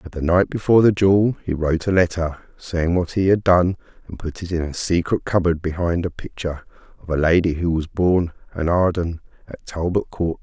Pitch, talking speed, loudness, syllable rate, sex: 85 Hz, 205 wpm, -20 LUFS, 5.3 syllables/s, male